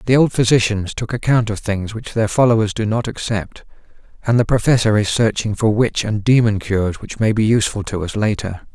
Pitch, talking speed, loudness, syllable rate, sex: 110 Hz, 205 wpm, -17 LUFS, 5.5 syllables/s, male